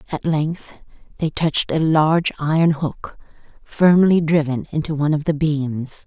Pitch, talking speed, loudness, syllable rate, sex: 155 Hz, 150 wpm, -19 LUFS, 4.6 syllables/s, female